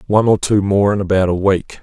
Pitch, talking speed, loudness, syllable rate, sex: 100 Hz, 265 wpm, -15 LUFS, 6.0 syllables/s, male